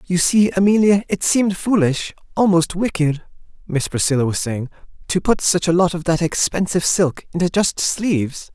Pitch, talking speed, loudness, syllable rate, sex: 175 Hz, 160 wpm, -18 LUFS, 5.0 syllables/s, male